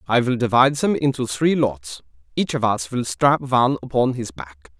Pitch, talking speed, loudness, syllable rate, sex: 120 Hz, 200 wpm, -20 LUFS, 5.2 syllables/s, male